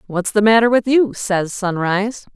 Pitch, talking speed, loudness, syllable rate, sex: 210 Hz, 180 wpm, -16 LUFS, 4.7 syllables/s, female